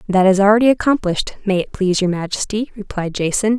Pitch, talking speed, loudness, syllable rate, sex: 200 Hz, 185 wpm, -17 LUFS, 6.3 syllables/s, female